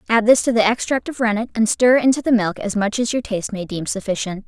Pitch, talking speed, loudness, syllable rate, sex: 220 Hz, 270 wpm, -18 LUFS, 6.2 syllables/s, female